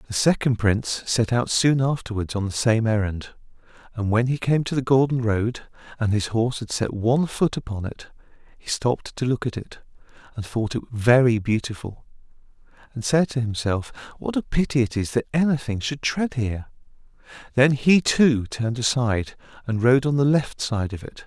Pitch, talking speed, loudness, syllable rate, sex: 120 Hz, 185 wpm, -22 LUFS, 5.2 syllables/s, male